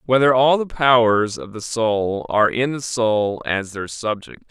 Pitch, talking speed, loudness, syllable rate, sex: 115 Hz, 185 wpm, -19 LUFS, 4.2 syllables/s, male